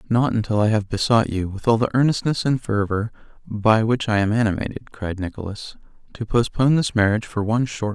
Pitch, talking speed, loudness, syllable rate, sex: 110 Hz, 205 wpm, -21 LUFS, 6.0 syllables/s, male